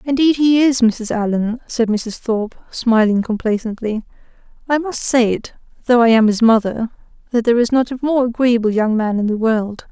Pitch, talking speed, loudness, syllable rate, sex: 235 Hz, 190 wpm, -16 LUFS, 5.1 syllables/s, female